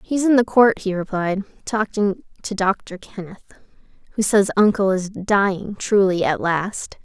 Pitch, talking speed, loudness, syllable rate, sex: 200 Hz, 155 wpm, -19 LUFS, 4.3 syllables/s, female